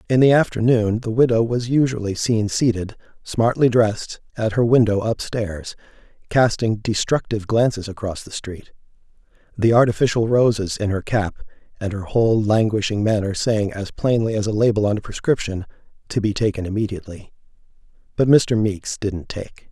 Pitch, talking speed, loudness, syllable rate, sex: 110 Hz, 150 wpm, -20 LUFS, 5.2 syllables/s, male